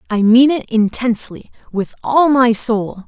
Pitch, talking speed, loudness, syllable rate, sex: 235 Hz, 135 wpm, -14 LUFS, 4.4 syllables/s, female